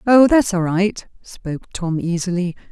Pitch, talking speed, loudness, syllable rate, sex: 190 Hz, 155 wpm, -18 LUFS, 4.3 syllables/s, female